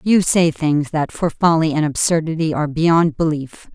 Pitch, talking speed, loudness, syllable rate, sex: 160 Hz, 175 wpm, -17 LUFS, 4.7 syllables/s, female